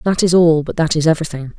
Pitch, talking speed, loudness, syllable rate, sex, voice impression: 160 Hz, 265 wpm, -15 LUFS, 6.9 syllables/s, female, feminine, adult-like, fluent, calm